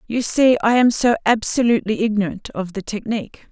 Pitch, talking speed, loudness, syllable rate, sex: 220 Hz, 170 wpm, -18 LUFS, 5.7 syllables/s, female